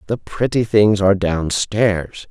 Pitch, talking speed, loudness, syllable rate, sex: 100 Hz, 130 wpm, -17 LUFS, 3.8 syllables/s, male